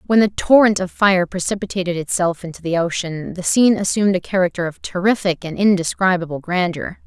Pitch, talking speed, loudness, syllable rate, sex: 185 Hz, 170 wpm, -18 LUFS, 5.8 syllables/s, female